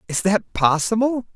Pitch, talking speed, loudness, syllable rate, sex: 205 Hz, 135 wpm, -20 LUFS, 4.6 syllables/s, male